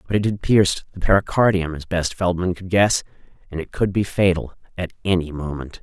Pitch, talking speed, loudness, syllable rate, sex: 90 Hz, 195 wpm, -21 LUFS, 5.7 syllables/s, male